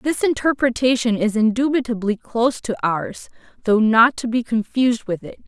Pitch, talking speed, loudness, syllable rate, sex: 235 Hz, 155 wpm, -19 LUFS, 5.1 syllables/s, female